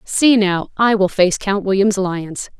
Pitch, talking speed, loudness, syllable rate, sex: 195 Hz, 185 wpm, -16 LUFS, 3.8 syllables/s, female